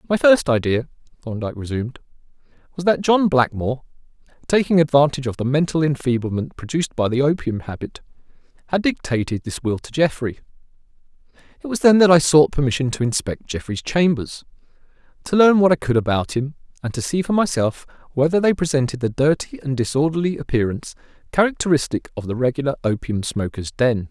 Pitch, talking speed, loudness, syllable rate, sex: 140 Hz, 160 wpm, -20 LUFS, 6.0 syllables/s, male